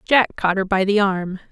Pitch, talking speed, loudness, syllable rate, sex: 195 Hz, 240 wpm, -19 LUFS, 4.9 syllables/s, female